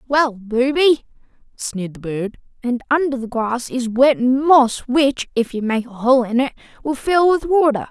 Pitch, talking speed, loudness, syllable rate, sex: 250 Hz, 180 wpm, -18 LUFS, 4.4 syllables/s, male